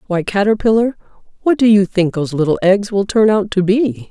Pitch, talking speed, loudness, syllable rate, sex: 200 Hz, 205 wpm, -15 LUFS, 5.5 syllables/s, female